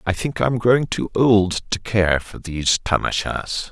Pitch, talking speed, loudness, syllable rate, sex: 100 Hz, 180 wpm, -20 LUFS, 4.2 syllables/s, male